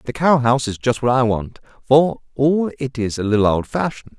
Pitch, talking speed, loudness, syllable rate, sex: 125 Hz, 215 wpm, -18 LUFS, 5.8 syllables/s, male